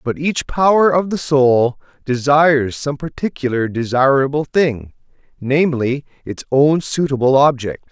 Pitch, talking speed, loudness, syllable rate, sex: 140 Hz, 115 wpm, -16 LUFS, 4.4 syllables/s, male